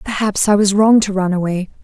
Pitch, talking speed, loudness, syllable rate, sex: 200 Hz, 230 wpm, -15 LUFS, 5.6 syllables/s, female